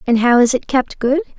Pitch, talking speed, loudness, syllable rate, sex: 260 Hz, 260 wpm, -15 LUFS, 5.5 syllables/s, female